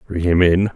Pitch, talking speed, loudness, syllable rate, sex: 90 Hz, 240 wpm, -16 LUFS, 5.2 syllables/s, male